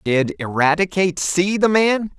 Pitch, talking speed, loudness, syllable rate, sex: 175 Hz, 135 wpm, -18 LUFS, 4.5 syllables/s, male